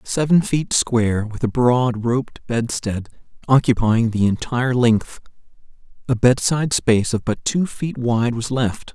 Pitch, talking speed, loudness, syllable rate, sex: 120 Hz, 150 wpm, -19 LUFS, 4.4 syllables/s, male